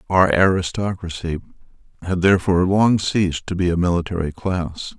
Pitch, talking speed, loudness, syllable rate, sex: 90 Hz, 130 wpm, -19 LUFS, 5.3 syllables/s, male